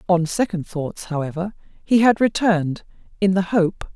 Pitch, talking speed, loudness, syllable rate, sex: 180 Hz, 150 wpm, -20 LUFS, 5.4 syllables/s, female